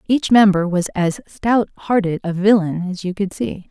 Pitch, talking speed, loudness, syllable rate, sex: 195 Hz, 195 wpm, -18 LUFS, 4.6 syllables/s, female